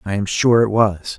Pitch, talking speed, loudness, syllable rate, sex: 105 Hz, 255 wpm, -16 LUFS, 4.6 syllables/s, male